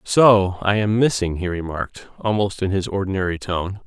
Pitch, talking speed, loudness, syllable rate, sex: 95 Hz, 170 wpm, -20 LUFS, 5.0 syllables/s, male